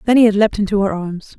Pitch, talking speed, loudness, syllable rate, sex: 205 Hz, 305 wpm, -16 LUFS, 6.4 syllables/s, female